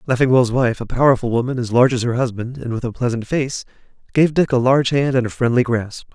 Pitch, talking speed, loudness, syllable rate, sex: 125 Hz, 235 wpm, -18 LUFS, 6.2 syllables/s, male